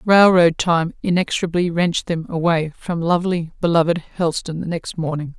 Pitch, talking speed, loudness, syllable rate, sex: 170 Hz, 145 wpm, -19 LUFS, 5.4 syllables/s, female